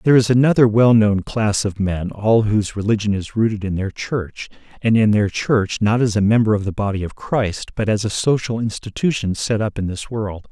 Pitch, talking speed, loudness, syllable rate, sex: 105 Hz, 225 wpm, -18 LUFS, 5.2 syllables/s, male